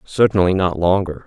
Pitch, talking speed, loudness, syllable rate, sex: 90 Hz, 145 wpm, -17 LUFS, 5.1 syllables/s, male